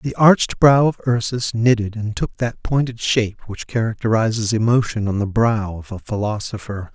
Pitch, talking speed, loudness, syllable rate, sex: 115 Hz, 175 wpm, -19 LUFS, 5.0 syllables/s, male